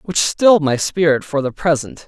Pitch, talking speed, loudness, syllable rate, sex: 155 Hz, 205 wpm, -16 LUFS, 4.9 syllables/s, male